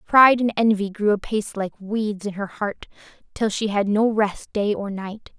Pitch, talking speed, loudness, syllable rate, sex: 210 Hz, 200 wpm, -22 LUFS, 4.7 syllables/s, female